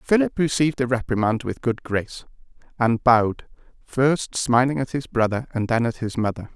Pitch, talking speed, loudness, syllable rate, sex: 120 Hz, 175 wpm, -22 LUFS, 5.2 syllables/s, male